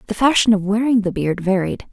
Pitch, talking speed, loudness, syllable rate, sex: 210 Hz, 220 wpm, -17 LUFS, 5.8 syllables/s, female